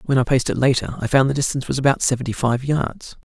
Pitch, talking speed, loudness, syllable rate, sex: 130 Hz, 255 wpm, -20 LUFS, 6.8 syllables/s, male